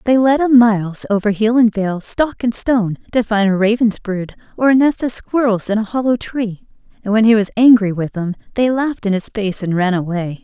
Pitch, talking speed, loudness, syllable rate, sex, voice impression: 220 Hz, 230 wpm, -16 LUFS, 5.3 syllables/s, female, very feminine, very adult-like, middle-aged, slightly thin, relaxed, slightly weak, slightly bright, very soft, very clear, very fluent, very cute, very intellectual, refreshing, very sincere, very calm, very friendly, very reassuring, very unique, very elegant, very sweet, lively, very kind, modest, slightly light